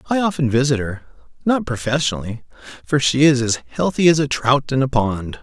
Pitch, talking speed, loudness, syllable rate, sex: 135 Hz, 190 wpm, -18 LUFS, 5.5 syllables/s, male